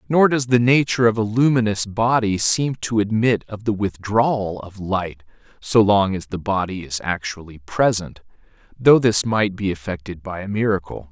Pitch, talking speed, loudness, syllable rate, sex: 105 Hz, 175 wpm, -19 LUFS, 4.8 syllables/s, male